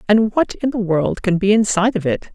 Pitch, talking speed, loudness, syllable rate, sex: 205 Hz, 255 wpm, -17 LUFS, 5.5 syllables/s, female